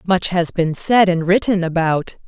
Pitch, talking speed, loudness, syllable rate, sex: 180 Hz, 185 wpm, -17 LUFS, 4.3 syllables/s, female